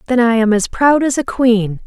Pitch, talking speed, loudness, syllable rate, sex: 235 Hz, 255 wpm, -14 LUFS, 4.8 syllables/s, female